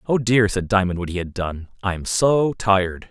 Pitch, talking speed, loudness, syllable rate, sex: 100 Hz, 210 wpm, -20 LUFS, 4.6 syllables/s, male